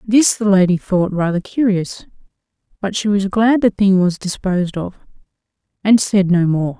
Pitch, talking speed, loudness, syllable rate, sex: 195 Hz, 170 wpm, -16 LUFS, 4.7 syllables/s, female